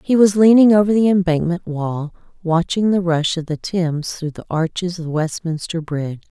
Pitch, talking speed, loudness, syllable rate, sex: 175 Hz, 180 wpm, -18 LUFS, 5.0 syllables/s, female